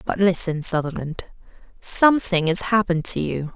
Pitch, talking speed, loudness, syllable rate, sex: 180 Hz, 135 wpm, -19 LUFS, 5.1 syllables/s, female